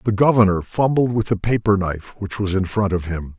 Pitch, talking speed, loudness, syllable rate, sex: 100 Hz, 230 wpm, -19 LUFS, 5.6 syllables/s, male